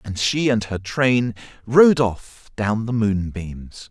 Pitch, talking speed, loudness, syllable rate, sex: 110 Hz, 155 wpm, -19 LUFS, 3.2 syllables/s, male